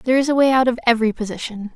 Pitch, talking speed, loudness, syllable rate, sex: 240 Hz, 275 wpm, -18 LUFS, 7.9 syllables/s, female